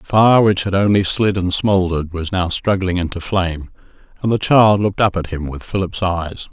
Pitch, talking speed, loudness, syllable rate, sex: 95 Hz, 210 wpm, -17 LUFS, 5.2 syllables/s, male